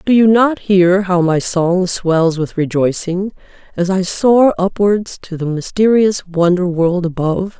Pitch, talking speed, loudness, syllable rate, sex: 185 Hz, 160 wpm, -14 LUFS, 4.0 syllables/s, female